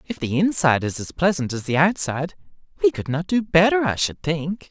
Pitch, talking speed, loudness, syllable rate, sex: 165 Hz, 215 wpm, -21 LUFS, 5.6 syllables/s, male